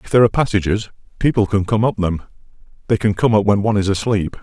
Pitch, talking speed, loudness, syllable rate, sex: 105 Hz, 230 wpm, -17 LUFS, 7.0 syllables/s, male